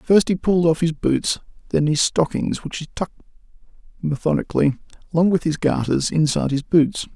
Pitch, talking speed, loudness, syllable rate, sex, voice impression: 160 Hz, 170 wpm, -20 LUFS, 5.8 syllables/s, male, very masculine, very adult-like, slightly old, very thick, slightly tensed, slightly weak, dark, hard, muffled, slightly halting, raspy, cool, slightly intellectual, very sincere, very calm, very mature, friendly, slightly reassuring, unique, elegant, wild, very kind, very modest